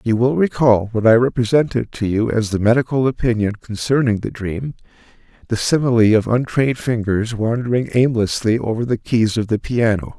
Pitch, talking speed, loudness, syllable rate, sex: 115 Hz, 165 wpm, -18 LUFS, 5.3 syllables/s, male